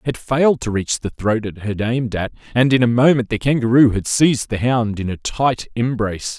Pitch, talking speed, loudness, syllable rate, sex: 120 Hz, 225 wpm, -18 LUFS, 5.4 syllables/s, male